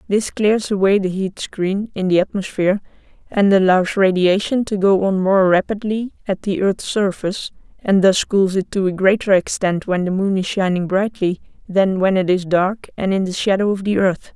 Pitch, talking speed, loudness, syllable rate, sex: 195 Hz, 195 wpm, -18 LUFS, 4.9 syllables/s, female